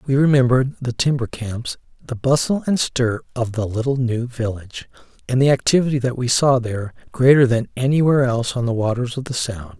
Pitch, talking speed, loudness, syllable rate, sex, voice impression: 125 Hz, 190 wpm, -19 LUFS, 5.8 syllables/s, male, masculine, old, powerful, slightly hard, raspy, sincere, calm, mature, wild, slightly strict